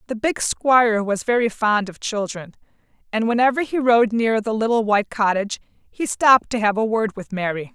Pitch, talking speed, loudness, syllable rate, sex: 220 Hz, 195 wpm, -20 LUFS, 5.2 syllables/s, female